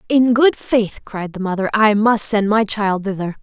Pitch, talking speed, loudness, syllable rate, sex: 210 Hz, 210 wpm, -17 LUFS, 4.4 syllables/s, female